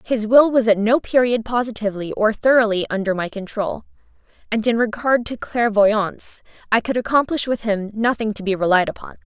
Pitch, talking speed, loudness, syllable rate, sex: 220 Hz, 175 wpm, -19 LUFS, 5.4 syllables/s, female